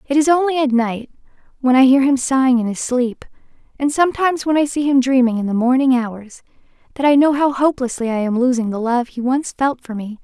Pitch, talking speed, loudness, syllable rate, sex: 260 Hz, 230 wpm, -17 LUFS, 5.8 syllables/s, female